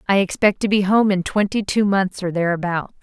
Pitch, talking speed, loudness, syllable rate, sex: 195 Hz, 220 wpm, -19 LUFS, 5.4 syllables/s, female